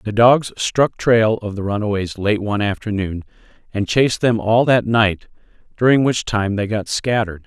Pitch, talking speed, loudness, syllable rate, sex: 110 Hz, 175 wpm, -18 LUFS, 4.9 syllables/s, male